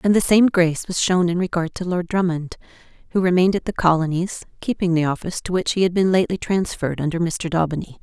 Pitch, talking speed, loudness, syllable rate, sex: 175 Hz, 215 wpm, -20 LUFS, 6.4 syllables/s, female